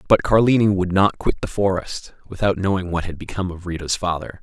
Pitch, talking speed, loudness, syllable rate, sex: 95 Hz, 205 wpm, -20 LUFS, 5.8 syllables/s, male